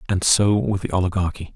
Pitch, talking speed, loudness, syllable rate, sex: 95 Hz, 195 wpm, -20 LUFS, 5.8 syllables/s, male